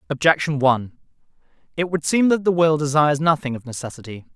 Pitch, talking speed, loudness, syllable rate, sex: 150 Hz, 165 wpm, -19 LUFS, 6.5 syllables/s, male